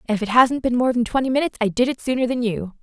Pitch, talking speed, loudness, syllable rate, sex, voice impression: 240 Hz, 320 wpm, -20 LUFS, 7.2 syllables/s, female, feminine, slightly adult-like, soft, intellectual, calm, elegant, slightly sweet, slightly kind